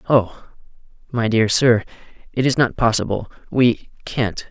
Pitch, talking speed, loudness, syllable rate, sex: 115 Hz, 105 wpm, -19 LUFS, 4.2 syllables/s, male